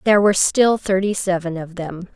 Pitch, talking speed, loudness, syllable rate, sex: 190 Hz, 195 wpm, -18 LUFS, 5.7 syllables/s, female